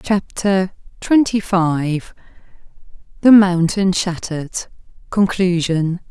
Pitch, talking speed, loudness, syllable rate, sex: 185 Hz, 50 wpm, -17 LUFS, 3.3 syllables/s, female